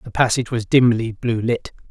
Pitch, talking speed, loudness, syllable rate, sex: 115 Hz, 190 wpm, -19 LUFS, 5.4 syllables/s, male